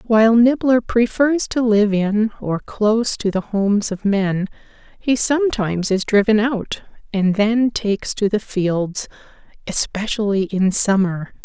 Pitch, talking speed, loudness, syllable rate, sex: 210 Hz, 140 wpm, -18 LUFS, 4.2 syllables/s, female